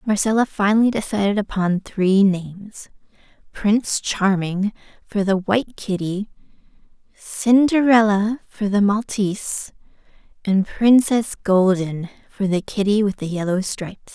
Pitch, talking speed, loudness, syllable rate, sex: 205 Hz, 110 wpm, -19 LUFS, 4.4 syllables/s, female